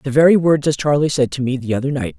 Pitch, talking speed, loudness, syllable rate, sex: 140 Hz, 300 wpm, -16 LUFS, 6.5 syllables/s, female